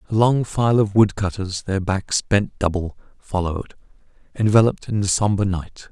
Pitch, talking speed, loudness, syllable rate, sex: 100 Hz, 150 wpm, -20 LUFS, 4.9 syllables/s, male